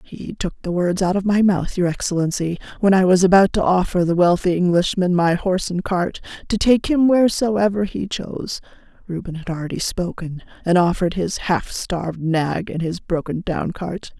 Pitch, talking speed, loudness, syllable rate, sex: 180 Hz, 185 wpm, -19 LUFS, 5.1 syllables/s, female